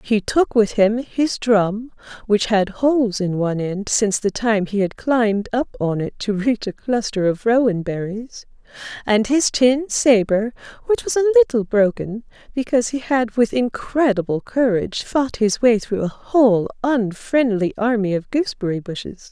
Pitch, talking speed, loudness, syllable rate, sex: 225 Hz, 170 wpm, -19 LUFS, 4.6 syllables/s, female